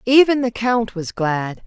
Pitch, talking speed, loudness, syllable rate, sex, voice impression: 225 Hz, 180 wpm, -19 LUFS, 3.9 syllables/s, female, very feminine, adult-like, elegant